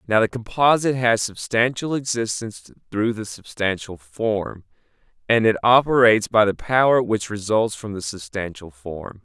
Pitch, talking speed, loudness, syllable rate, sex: 110 Hz, 145 wpm, -20 LUFS, 4.8 syllables/s, male